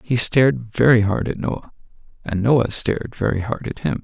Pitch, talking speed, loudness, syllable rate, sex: 115 Hz, 195 wpm, -19 LUFS, 5.0 syllables/s, male